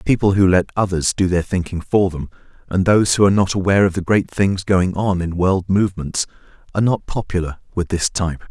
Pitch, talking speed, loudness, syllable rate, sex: 95 Hz, 210 wpm, -18 LUFS, 5.9 syllables/s, male